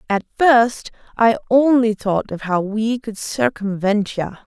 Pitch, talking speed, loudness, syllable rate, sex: 225 Hz, 145 wpm, -18 LUFS, 3.8 syllables/s, female